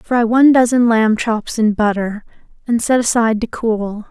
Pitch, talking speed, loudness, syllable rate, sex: 225 Hz, 175 wpm, -15 LUFS, 4.7 syllables/s, female